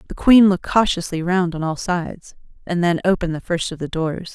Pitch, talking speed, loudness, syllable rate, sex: 175 Hz, 220 wpm, -19 LUFS, 5.8 syllables/s, female